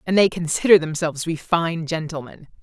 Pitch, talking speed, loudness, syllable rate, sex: 165 Hz, 185 wpm, -20 LUFS, 5.9 syllables/s, female